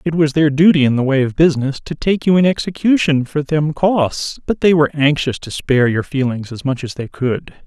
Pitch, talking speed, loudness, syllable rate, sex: 150 Hz, 235 wpm, -16 LUFS, 5.5 syllables/s, male